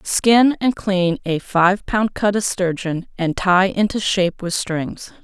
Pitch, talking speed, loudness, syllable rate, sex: 190 Hz, 170 wpm, -18 LUFS, 3.7 syllables/s, female